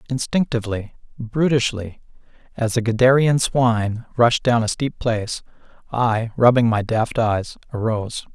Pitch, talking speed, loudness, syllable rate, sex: 115 Hz, 120 wpm, -20 LUFS, 4.6 syllables/s, male